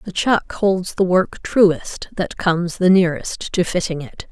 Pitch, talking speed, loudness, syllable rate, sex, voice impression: 180 Hz, 180 wpm, -18 LUFS, 4.1 syllables/s, female, very feminine, middle-aged, thin, tensed, slightly powerful, slightly bright, hard, clear, fluent, slightly cool, intellectual, very refreshing, slightly sincere, calm, slightly friendly, reassuring, unique, elegant, slightly wild, slightly sweet, slightly lively, strict, sharp